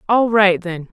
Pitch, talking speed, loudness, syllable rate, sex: 195 Hz, 185 wpm, -15 LUFS, 4.1 syllables/s, female